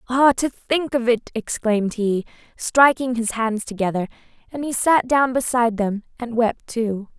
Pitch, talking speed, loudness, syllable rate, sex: 235 Hz, 165 wpm, -20 LUFS, 4.5 syllables/s, female